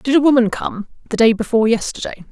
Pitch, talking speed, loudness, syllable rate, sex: 235 Hz, 205 wpm, -16 LUFS, 6.5 syllables/s, female